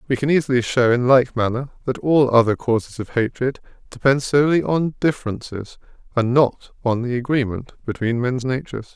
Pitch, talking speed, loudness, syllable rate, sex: 125 Hz, 165 wpm, -20 LUFS, 5.5 syllables/s, male